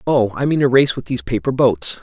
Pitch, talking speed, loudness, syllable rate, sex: 130 Hz, 265 wpm, -17 LUFS, 6.0 syllables/s, male